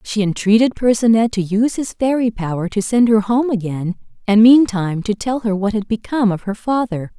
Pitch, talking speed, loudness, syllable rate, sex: 215 Hz, 200 wpm, -16 LUFS, 5.5 syllables/s, female